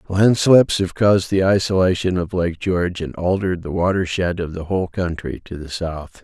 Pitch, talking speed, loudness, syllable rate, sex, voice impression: 90 Hz, 185 wpm, -19 LUFS, 5.1 syllables/s, male, masculine, slightly old, slightly tensed, powerful, slightly hard, muffled, slightly raspy, calm, mature, friendly, reassuring, wild, slightly lively, kind